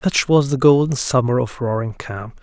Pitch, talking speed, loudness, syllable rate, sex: 130 Hz, 200 wpm, -17 LUFS, 4.6 syllables/s, male